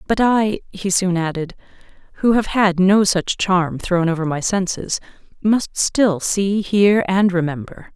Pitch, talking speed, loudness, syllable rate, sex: 190 Hz, 160 wpm, -18 LUFS, 3.9 syllables/s, female